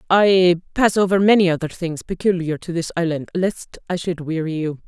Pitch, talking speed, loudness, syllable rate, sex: 175 Hz, 185 wpm, -19 LUFS, 5.2 syllables/s, female